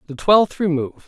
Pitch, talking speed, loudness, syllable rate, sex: 165 Hz, 165 wpm, -18 LUFS, 5.6 syllables/s, male